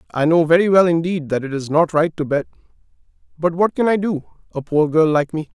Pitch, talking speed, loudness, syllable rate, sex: 165 Hz, 235 wpm, -18 LUFS, 5.9 syllables/s, male